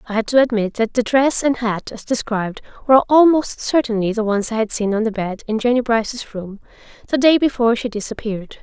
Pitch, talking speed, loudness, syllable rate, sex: 230 Hz, 215 wpm, -18 LUFS, 5.9 syllables/s, female